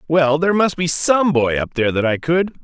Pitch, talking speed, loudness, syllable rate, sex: 155 Hz, 250 wpm, -17 LUFS, 5.6 syllables/s, male